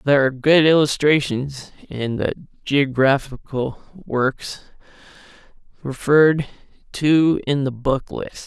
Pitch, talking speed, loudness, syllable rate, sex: 140 Hz, 100 wpm, -19 LUFS, 3.8 syllables/s, male